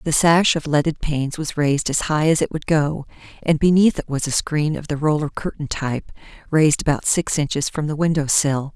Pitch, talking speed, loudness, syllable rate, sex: 150 Hz, 220 wpm, -20 LUFS, 5.4 syllables/s, female